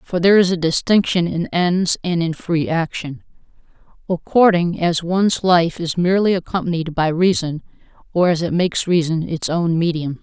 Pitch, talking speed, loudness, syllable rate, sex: 170 Hz, 165 wpm, -18 LUFS, 5.0 syllables/s, female